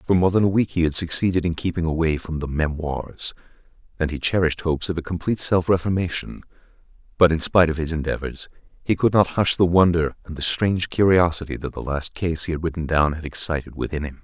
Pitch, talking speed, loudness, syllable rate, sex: 85 Hz, 215 wpm, -22 LUFS, 6.2 syllables/s, male